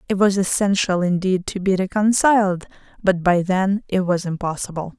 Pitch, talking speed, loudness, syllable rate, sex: 190 Hz, 155 wpm, -19 LUFS, 5.0 syllables/s, female